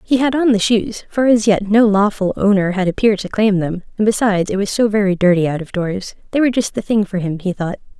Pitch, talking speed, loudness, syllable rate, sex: 205 Hz, 265 wpm, -16 LUFS, 6.0 syllables/s, female